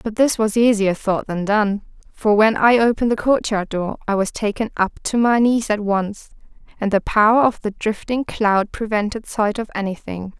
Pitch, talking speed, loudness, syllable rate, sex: 215 Hz, 195 wpm, -19 LUFS, 4.8 syllables/s, female